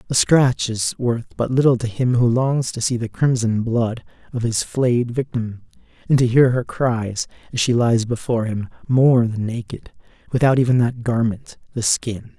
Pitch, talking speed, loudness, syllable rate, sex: 120 Hz, 185 wpm, -19 LUFS, 4.5 syllables/s, male